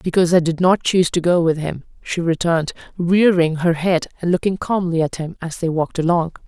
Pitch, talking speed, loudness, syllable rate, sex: 170 Hz, 215 wpm, -18 LUFS, 5.8 syllables/s, female